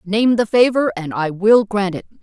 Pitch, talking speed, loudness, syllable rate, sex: 205 Hz, 215 wpm, -16 LUFS, 4.6 syllables/s, female